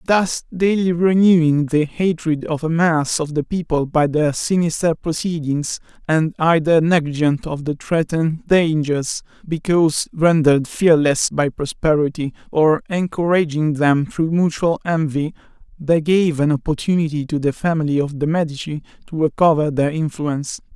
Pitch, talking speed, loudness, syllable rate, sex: 155 Hz, 135 wpm, -18 LUFS, 4.6 syllables/s, male